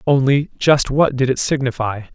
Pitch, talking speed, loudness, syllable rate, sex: 130 Hz, 140 wpm, -17 LUFS, 4.7 syllables/s, male